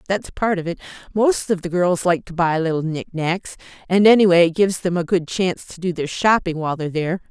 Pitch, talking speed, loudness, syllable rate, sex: 175 Hz, 240 wpm, -19 LUFS, 6.0 syllables/s, female